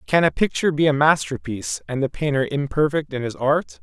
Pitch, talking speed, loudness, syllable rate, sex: 140 Hz, 205 wpm, -21 LUFS, 5.8 syllables/s, male